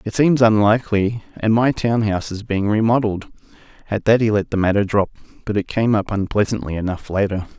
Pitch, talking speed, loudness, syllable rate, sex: 105 Hz, 190 wpm, -19 LUFS, 5.9 syllables/s, male